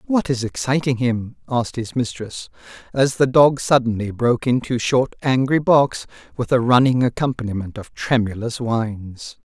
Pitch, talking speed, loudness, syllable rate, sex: 120 Hz, 145 wpm, -19 LUFS, 4.8 syllables/s, male